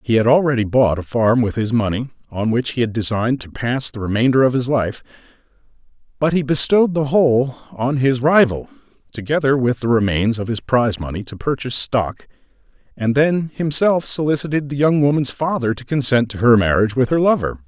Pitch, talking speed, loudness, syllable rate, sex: 125 Hz, 190 wpm, -17 LUFS, 5.7 syllables/s, male